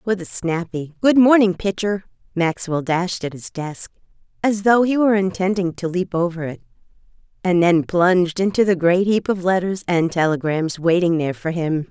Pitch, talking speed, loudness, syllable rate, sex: 180 Hz, 175 wpm, -19 LUFS, 5.0 syllables/s, female